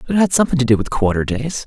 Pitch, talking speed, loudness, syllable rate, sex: 135 Hz, 325 wpm, -17 LUFS, 7.8 syllables/s, male